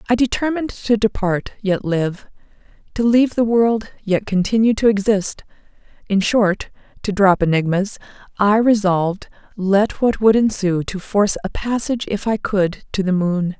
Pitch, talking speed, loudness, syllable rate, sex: 205 Hz, 145 wpm, -18 LUFS, 4.8 syllables/s, female